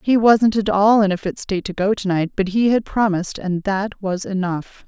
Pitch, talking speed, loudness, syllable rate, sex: 200 Hz, 245 wpm, -19 LUFS, 5.1 syllables/s, female